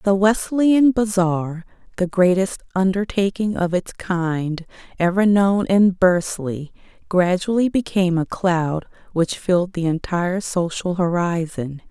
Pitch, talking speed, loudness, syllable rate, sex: 185 Hz, 115 wpm, -20 LUFS, 4.0 syllables/s, female